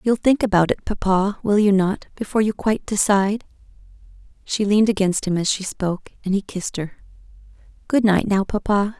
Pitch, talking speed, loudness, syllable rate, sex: 200 Hz, 175 wpm, -20 LUFS, 5.8 syllables/s, female